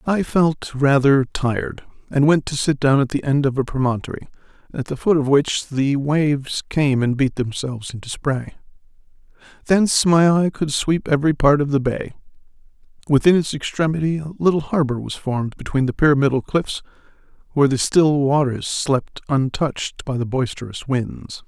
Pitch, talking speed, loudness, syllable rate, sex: 140 Hz, 170 wpm, -19 LUFS, 5.1 syllables/s, male